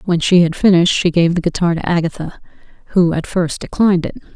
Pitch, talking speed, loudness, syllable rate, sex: 175 Hz, 205 wpm, -15 LUFS, 6.1 syllables/s, female